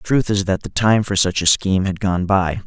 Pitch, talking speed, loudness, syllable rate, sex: 95 Hz, 295 wpm, -18 LUFS, 5.4 syllables/s, male